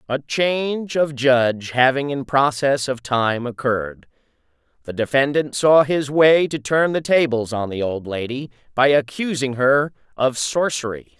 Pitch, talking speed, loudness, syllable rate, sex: 135 Hz, 150 wpm, -19 LUFS, 4.3 syllables/s, male